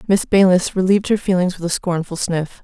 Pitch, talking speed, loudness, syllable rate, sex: 185 Hz, 205 wpm, -17 LUFS, 5.7 syllables/s, female